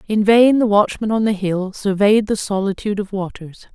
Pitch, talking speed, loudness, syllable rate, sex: 205 Hz, 190 wpm, -17 LUFS, 5.1 syllables/s, female